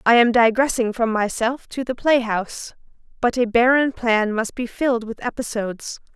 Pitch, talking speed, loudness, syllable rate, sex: 235 Hz, 175 wpm, -20 LUFS, 5.0 syllables/s, female